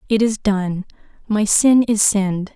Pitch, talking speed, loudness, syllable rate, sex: 205 Hz, 140 wpm, -17 LUFS, 4.2 syllables/s, female